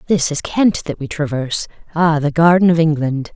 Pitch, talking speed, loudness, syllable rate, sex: 160 Hz, 195 wpm, -16 LUFS, 5.2 syllables/s, female